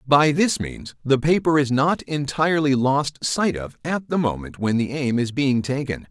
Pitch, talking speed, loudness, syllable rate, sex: 140 Hz, 195 wpm, -21 LUFS, 4.5 syllables/s, male